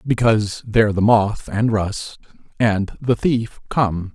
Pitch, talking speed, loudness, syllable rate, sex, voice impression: 110 Hz, 145 wpm, -19 LUFS, 3.8 syllables/s, male, masculine, adult-like, slightly thick, fluent, cool, slightly intellectual, friendly